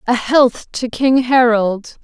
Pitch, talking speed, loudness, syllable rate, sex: 240 Hz, 150 wpm, -14 LUFS, 3.3 syllables/s, female